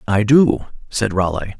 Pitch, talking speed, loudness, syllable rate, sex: 105 Hz, 150 wpm, -17 LUFS, 4.1 syllables/s, male